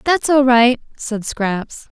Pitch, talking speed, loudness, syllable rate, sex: 245 Hz, 150 wpm, -16 LUFS, 3.1 syllables/s, female